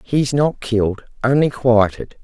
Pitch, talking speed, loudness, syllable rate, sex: 125 Hz, 135 wpm, -17 LUFS, 4.2 syllables/s, female